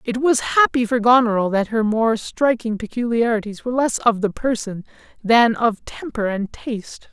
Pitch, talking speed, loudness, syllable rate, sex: 230 Hz, 170 wpm, -19 LUFS, 4.8 syllables/s, male